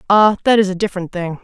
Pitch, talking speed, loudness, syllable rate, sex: 195 Hz, 250 wpm, -16 LUFS, 7.0 syllables/s, female